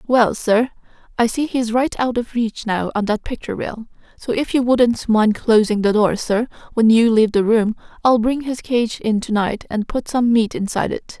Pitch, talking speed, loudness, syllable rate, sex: 230 Hz, 220 wpm, -18 LUFS, 4.9 syllables/s, female